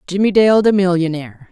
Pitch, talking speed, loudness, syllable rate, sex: 190 Hz, 160 wpm, -14 LUFS, 5.9 syllables/s, female